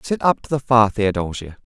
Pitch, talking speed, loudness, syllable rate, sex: 115 Hz, 215 wpm, -19 LUFS, 5.3 syllables/s, male